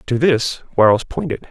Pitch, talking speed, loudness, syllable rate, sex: 120 Hz, 160 wpm, -17 LUFS, 4.7 syllables/s, male